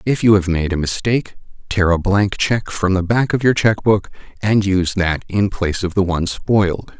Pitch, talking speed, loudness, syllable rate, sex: 100 Hz, 225 wpm, -17 LUFS, 5.1 syllables/s, male